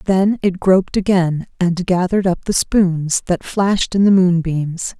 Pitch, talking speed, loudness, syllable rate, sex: 180 Hz, 170 wpm, -16 LUFS, 4.3 syllables/s, female